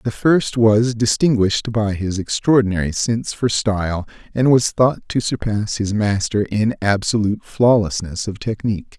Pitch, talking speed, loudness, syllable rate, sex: 110 Hz, 145 wpm, -18 LUFS, 4.7 syllables/s, male